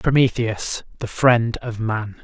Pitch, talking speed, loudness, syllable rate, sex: 115 Hz, 135 wpm, -20 LUFS, 3.6 syllables/s, male